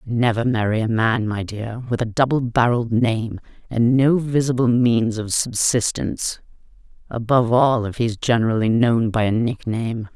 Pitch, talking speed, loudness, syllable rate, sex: 115 Hz, 155 wpm, -20 LUFS, 4.8 syllables/s, female